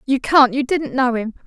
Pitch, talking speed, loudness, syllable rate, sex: 260 Hz, 245 wpm, -17 LUFS, 4.8 syllables/s, female